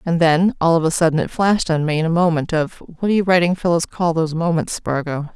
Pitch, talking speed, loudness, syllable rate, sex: 165 Hz, 245 wpm, -18 LUFS, 6.0 syllables/s, female